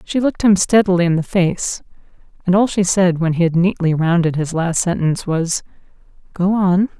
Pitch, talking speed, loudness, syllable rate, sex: 180 Hz, 180 wpm, -16 LUFS, 5.3 syllables/s, female